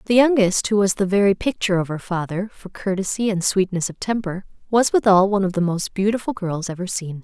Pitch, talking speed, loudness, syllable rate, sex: 195 Hz, 215 wpm, -20 LUFS, 5.9 syllables/s, female